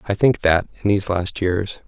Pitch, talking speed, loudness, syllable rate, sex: 95 Hz, 225 wpm, -20 LUFS, 5.2 syllables/s, male